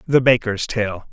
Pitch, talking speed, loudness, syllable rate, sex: 115 Hz, 160 wpm, -18 LUFS, 4.3 syllables/s, male